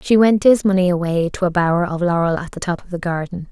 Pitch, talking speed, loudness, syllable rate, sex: 180 Hz, 255 wpm, -18 LUFS, 6.2 syllables/s, female